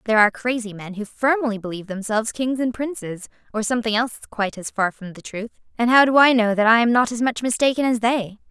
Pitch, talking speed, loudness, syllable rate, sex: 230 Hz, 240 wpm, -20 LUFS, 6.5 syllables/s, female